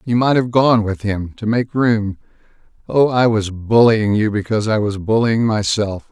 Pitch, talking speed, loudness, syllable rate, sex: 110 Hz, 185 wpm, -16 LUFS, 4.6 syllables/s, male